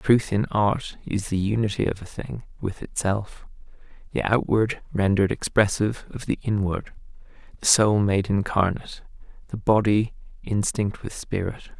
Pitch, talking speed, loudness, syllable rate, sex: 105 Hz, 135 wpm, -24 LUFS, 4.8 syllables/s, male